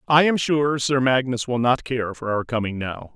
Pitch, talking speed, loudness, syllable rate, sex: 125 Hz, 230 wpm, -22 LUFS, 4.7 syllables/s, male